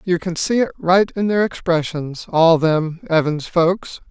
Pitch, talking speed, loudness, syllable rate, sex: 175 Hz, 175 wpm, -18 LUFS, 4.0 syllables/s, male